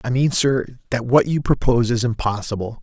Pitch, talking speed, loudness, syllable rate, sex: 120 Hz, 190 wpm, -20 LUFS, 5.7 syllables/s, male